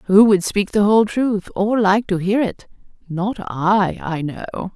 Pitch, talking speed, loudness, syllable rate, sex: 200 Hz, 175 wpm, -18 LUFS, 4.1 syllables/s, female